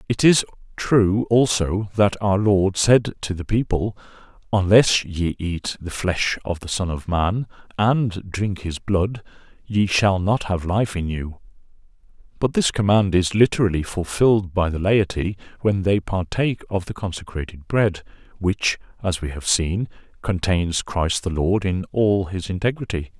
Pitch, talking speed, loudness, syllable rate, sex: 95 Hz, 160 wpm, -21 LUFS, 4.3 syllables/s, male